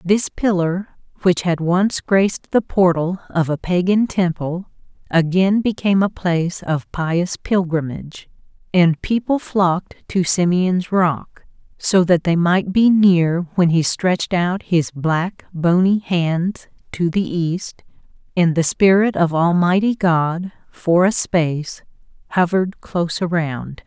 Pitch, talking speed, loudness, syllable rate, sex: 180 Hz, 135 wpm, -18 LUFS, 3.9 syllables/s, female